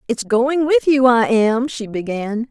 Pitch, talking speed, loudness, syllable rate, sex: 240 Hz, 190 wpm, -17 LUFS, 4.1 syllables/s, female